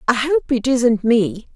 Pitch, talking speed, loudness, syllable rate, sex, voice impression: 240 Hz, 195 wpm, -17 LUFS, 3.7 syllables/s, female, very feminine, adult-like, slightly middle-aged, thin, tensed, powerful, bright, very hard, clear, slightly fluent, cool, slightly intellectual, refreshing, sincere, slightly calm, slightly friendly, slightly reassuring, unique, wild, lively, strict, intense, sharp